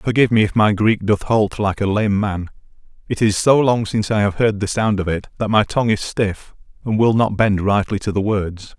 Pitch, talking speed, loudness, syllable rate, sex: 105 Hz, 245 wpm, -18 LUFS, 5.3 syllables/s, male